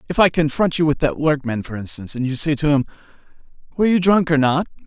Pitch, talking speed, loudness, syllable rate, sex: 150 Hz, 235 wpm, -19 LUFS, 6.7 syllables/s, male